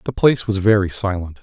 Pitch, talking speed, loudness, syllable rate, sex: 100 Hz, 210 wpm, -18 LUFS, 6.1 syllables/s, male